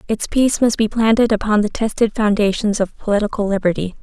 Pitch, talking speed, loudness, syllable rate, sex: 215 Hz, 180 wpm, -17 LUFS, 6.1 syllables/s, female